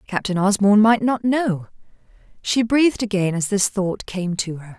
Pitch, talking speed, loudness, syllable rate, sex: 205 Hz, 175 wpm, -19 LUFS, 4.6 syllables/s, female